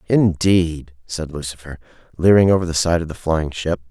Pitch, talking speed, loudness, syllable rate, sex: 85 Hz, 170 wpm, -18 LUFS, 5.0 syllables/s, male